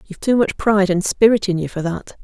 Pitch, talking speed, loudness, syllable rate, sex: 195 Hz, 270 wpm, -17 LUFS, 6.1 syllables/s, female